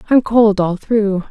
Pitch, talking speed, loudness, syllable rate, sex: 210 Hz, 185 wpm, -14 LUFS, 3.7 syllables/s, female